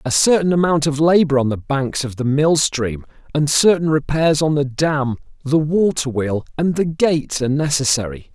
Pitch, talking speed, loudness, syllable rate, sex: 145 Hz, 185 wpm, -17 LUFS, 4.9 syllables/s, male